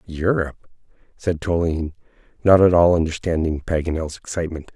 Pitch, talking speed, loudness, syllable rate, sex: 85 Hz, 115 wpm, -20 LUFS, 5.8 syllables/s, male